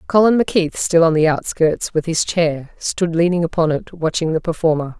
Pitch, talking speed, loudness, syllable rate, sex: 165 Hz, 190 wpm, -17 LUFS, 5.2 syllables/s, female